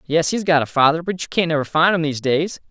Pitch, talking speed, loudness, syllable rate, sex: 160 Hz, 290 wpm, -18 LUFS, 6.4 syllables/s, male